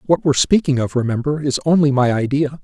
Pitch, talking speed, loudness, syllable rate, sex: 140 Hz, 205 wpm, -17 LUFS, 6.3 syllables/s, male